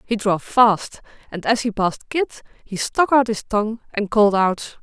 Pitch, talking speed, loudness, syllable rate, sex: 215 Hz, 200 wpm, -19 LUFS, 5.0 syllables/s, female